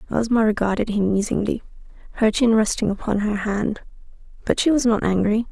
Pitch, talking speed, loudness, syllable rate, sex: 215 Hz, 165 wpm, -21 LUFS, 5.7 syllables/s, female